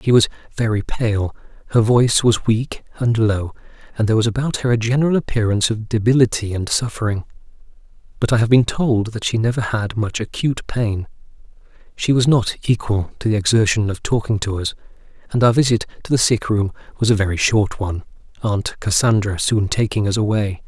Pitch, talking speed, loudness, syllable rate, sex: 110 Hz, 185 wpm, -18 LUFS, 5.7 syllables/s, male